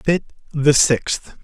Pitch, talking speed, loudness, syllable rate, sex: 145 Hz, 125 wpm, -17 LUFS, 2.7 syllables/s, male